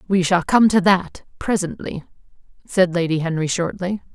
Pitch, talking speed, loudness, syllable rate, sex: 180 Hz, 145 wpm, -19 LUFS, 4.8 syllables/s, female